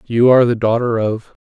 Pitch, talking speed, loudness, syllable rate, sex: 115 Hz, 210 wpm, -15 LUFS, 5.9 syllables/s, male